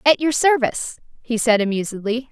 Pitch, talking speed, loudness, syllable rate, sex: 240 Hz, 155 wpm, -19 LUFS, 5.6 syllables/s, female